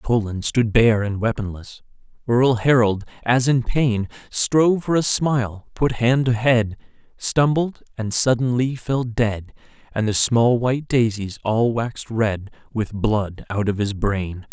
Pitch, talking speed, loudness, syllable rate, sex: 115 Hz, 155 wpm, -20 LUFS, 4.0 syllables/s, male